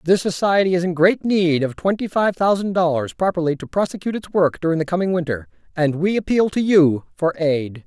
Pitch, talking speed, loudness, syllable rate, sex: 175 Hz, 205 wpm, -19 LUFS, 5.6 syllables/s, male